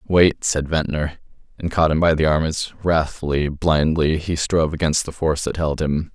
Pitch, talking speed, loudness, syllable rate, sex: 80 Hz, 195 wpm, -20 LUFS, 5.1 syllables/s, male